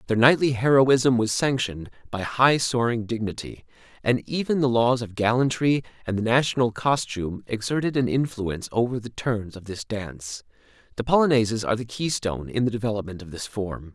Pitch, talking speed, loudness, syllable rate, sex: 115 Hz, 170 wpm, -24 LUFS, 5.5 syllables/s, male